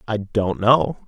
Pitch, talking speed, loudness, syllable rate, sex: 110 Hz, 170 wpm, -19 LUFS, 3.6 syllables/s, male